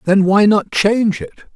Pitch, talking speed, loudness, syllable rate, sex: 205 Hz, 195 wpm, -14 LUFS, 5.0 syllables/s, male